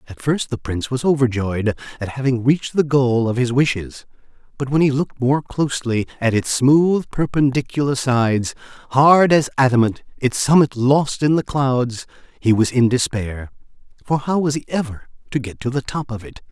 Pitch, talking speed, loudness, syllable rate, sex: 130 Hz, 175 wpm, -18 LUFS, 5.1 syllables/s, male